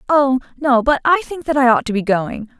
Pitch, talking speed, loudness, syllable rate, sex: 260 Hz, 255 wpm, -16 LUFS, 5.3 syllables/s, female